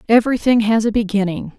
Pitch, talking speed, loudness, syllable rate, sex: 220 Hz, 150 wpm, -16 LUFS, 6.4 syllables/s, female